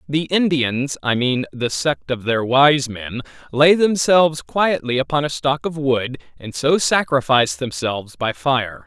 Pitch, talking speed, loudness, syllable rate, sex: 135 Hz, 160 wpm, -18 LUFS, 3.6 syllables/s, male